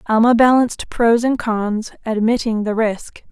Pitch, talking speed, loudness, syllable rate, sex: 225 Hz, 145 wpm, -17 LUFS, 4.4 syllables/s, female